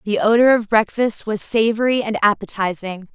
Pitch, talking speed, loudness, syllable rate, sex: 215 Hz, 155 wpm, -18 LUFS, 5.1 syllables/s, female